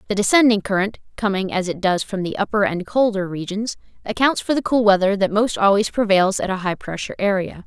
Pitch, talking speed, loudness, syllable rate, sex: 200 Hz, 195 wpm, -19 LUFS, 5.9 syllables/s, female